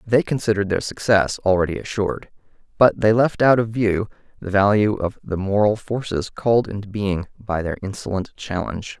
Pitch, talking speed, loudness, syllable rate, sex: 105 Hz, 165 wpm, -20 LUFS, 5.4 syllables/s, male